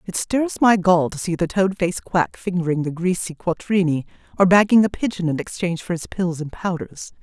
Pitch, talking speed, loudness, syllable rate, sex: 180 Hz, 210 wpm, -20 LUFS, 5.4 syllables/s, female